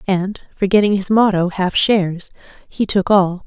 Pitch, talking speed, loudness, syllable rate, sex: 195 Hz, 155 wpm, -16 LUFS, 4.5 syllables/s, female